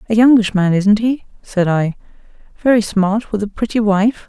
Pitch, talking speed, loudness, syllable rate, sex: 210 Hz, 180 wpm, -15 LUFS, 4.8 syllables/s, female